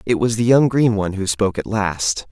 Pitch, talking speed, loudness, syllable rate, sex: 105 Hz, 260 wpm, -18 LUFS, 5.5 syllables/s, male